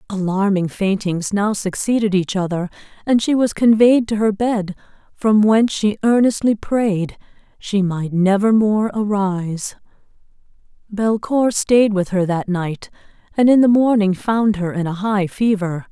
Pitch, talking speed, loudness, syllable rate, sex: 205 Hz, 145 wpm, -17 LUFS, 4.3 syllables/s, female